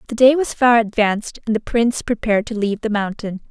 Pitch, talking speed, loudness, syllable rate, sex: 225 Hz, 225 wpm, -18 LUFS, 6.3 syllables/s, female